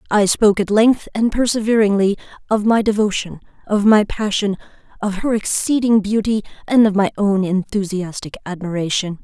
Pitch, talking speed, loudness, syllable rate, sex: 205 Hz, 135 wpm, -17 LUFS, 5.2 syllables/s, female